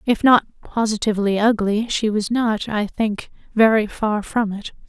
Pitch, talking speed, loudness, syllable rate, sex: 215 Hz, 160 wpm, -19 LUFS, 4.5 syllables/s, female